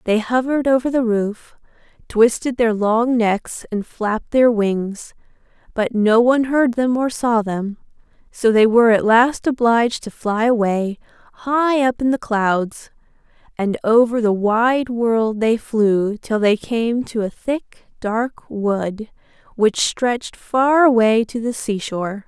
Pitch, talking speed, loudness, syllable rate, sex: 230 Hz, 155 wpm, -18 LUFS, 3.8 syllables/s, female